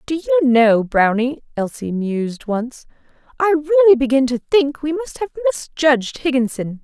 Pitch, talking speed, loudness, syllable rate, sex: 275 Hz, 150 wpm, -17 LUFS, 4.9 syllables/s, female